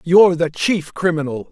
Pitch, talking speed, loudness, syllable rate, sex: 165 Hz, 160 wpm, -17 LUFS, 5.0 syllables/s, male